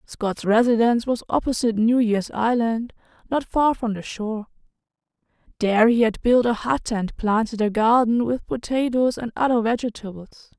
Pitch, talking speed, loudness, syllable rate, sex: 230 Hz, 155 wpm, -21 LUFS, 5.1 syllables/s, female